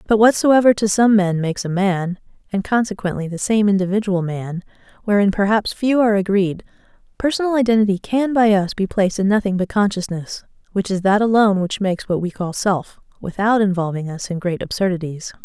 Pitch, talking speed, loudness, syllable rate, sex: 200 Hz, 180 wpm, -18 LUFS, 5.1 syllables/s, female